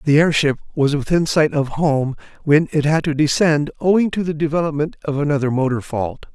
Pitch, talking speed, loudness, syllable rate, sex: 150 Hz, 190 wpm, -18 LUFS, 5.4 syllables/s, male